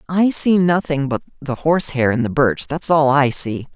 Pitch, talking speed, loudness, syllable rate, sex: 145 Hz, 225 wpm, -17 LUFS, 4.8 syllables/s, male